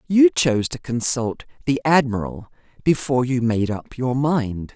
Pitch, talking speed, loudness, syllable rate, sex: 125 Hz, 150 wpm, -21 LUFS, 4.5 syllables/s, female